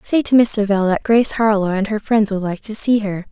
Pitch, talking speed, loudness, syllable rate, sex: 210 Hz, 270 wpm, -17 LUFS, 5.9 syllables/s, female